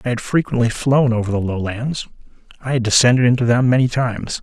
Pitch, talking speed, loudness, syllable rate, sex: 120 Hz, 190 wpm, -17 LUFS, 6.1 syllables/s, male